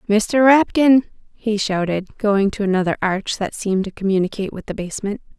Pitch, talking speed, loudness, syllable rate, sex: 205 Hz, 165 wpm, -19 LUFS, 5.5 syllables/s, female